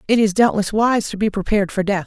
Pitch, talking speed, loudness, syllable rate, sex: 205 Hz, 260 wpm, -18 LUFS, 6.3 syllables/s, female